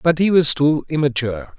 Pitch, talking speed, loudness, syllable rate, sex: 145 Hz, 190 wpm, -17 LUFS, 5.3 syllables/s, male